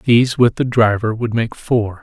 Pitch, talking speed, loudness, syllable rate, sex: 115 Hz, 205 wpm, -16 LUFS, 4.5 syllables/s, male